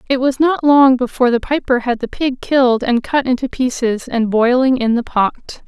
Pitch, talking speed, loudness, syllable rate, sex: 255 Hz, 210 wpm, -15 LUFS, 4.9 syllables/s, female